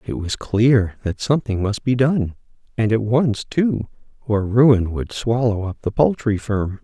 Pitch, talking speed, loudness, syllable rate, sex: 115 Hz, 175 wpm, -19 LUFS, 4.2 syllables/s, male